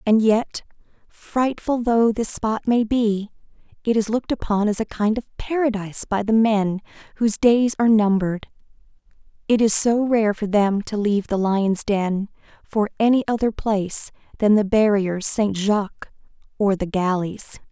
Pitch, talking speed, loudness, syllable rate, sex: 210 Hz, 160 wpm, -20 LUFS, 4.7 syllables/s, female